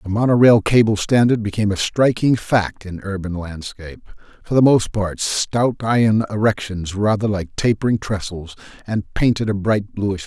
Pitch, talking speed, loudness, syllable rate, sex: 105 Hz, 170 wpm, -18 LUFS, 4.9 syllables/s, male